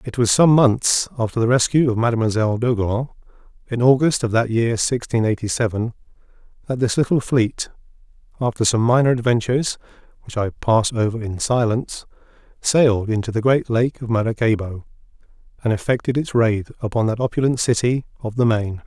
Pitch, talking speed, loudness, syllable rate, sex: 115 Hz, 155 wpm, -19 LUFS, 5.6 syllables/s, male